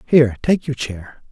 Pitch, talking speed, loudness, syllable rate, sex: 130 Hz, 185 wpm, -19 LUFS, 4.7 syllables/s, male